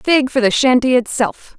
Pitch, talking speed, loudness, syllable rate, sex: 255 Hz, 225 wpm, -15 LUFS, 5.2 syllables/s, female